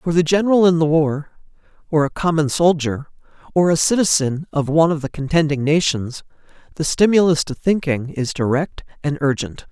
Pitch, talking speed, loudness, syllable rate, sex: 155 Hz, 165 wpm, -18 LUFS, 5.4 syllables/s, male